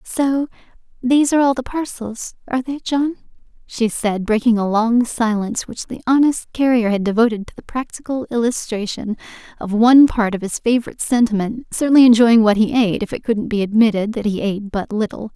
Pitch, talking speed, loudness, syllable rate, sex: 230 Hz, 180 wpm, -17 LUFS, 5.7 syllables/s, female